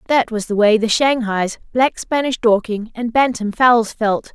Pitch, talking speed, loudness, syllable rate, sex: 230 Hz, 180 wpm, -17 LUFS, 4.3 syllables/s, female